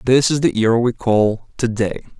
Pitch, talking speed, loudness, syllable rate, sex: 115 Hz, 220 wpm, -17 LUFS, 4.7 syllables/s, male